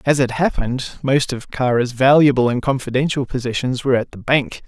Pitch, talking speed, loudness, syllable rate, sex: 130 Hz, 180 wpm, -18 LUFS, 5.6 syllables/s, male